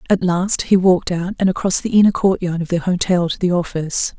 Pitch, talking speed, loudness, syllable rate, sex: 180 Hz, 230 wpm, -17 LUFS, 5.9 syllables/s, female